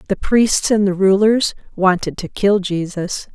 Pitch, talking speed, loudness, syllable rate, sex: 195 Hz, 160 wpm, -16 LUFS, 4.1 syllables/s, female